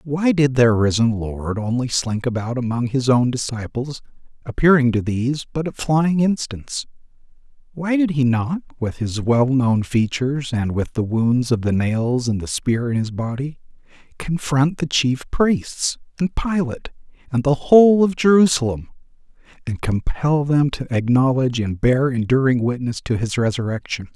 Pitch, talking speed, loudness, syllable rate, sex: 130 Hz, 155 wpm, -19 LUFS, 4.6 syllables/s, male